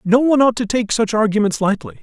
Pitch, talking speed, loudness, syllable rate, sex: 225 Hz, 235 wpm, -16 LUFS, 6.4 syllables/s, male